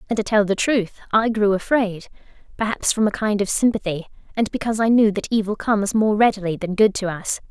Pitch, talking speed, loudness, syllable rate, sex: 210 Hz, 215 wpm, -20 LUFS, 5.9 syllables/s, female